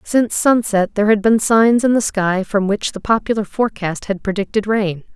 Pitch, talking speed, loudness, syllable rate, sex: 210 Hz, 200 wpm, -16 LUFS, 5.2 syllables/s, female